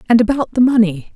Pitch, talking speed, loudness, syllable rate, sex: 225 Hz, 210 wpm, -14 LUFS, 6.3 syllables/s, female